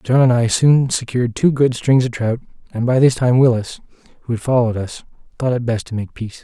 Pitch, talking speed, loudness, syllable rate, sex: 120 Hz, 235 wpm, -17 LUFS, 5.9 syllables/s, male